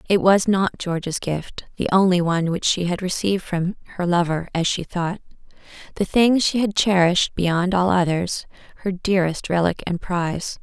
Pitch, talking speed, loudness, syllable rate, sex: 180 Hz, 165 wpm, -21 LUFS, 5.0 syllables/s, female